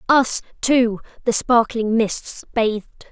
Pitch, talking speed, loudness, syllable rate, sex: 230 Hz, 115 wpm, -19 LUFS, 3.6 syllables/s, female